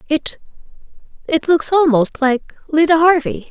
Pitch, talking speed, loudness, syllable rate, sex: 305 Hz, 105 wpm, -15 LUFS, 4.2 syllables/s, female